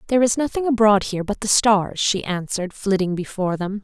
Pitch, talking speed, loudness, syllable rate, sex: 205 Hz, 205 wpm, -20 LUFS, 6.1 syllables/s, female